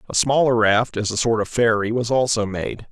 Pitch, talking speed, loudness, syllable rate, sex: 115 Hz, 225 wpm, -19 LUFS, 5.1 syllables/s, male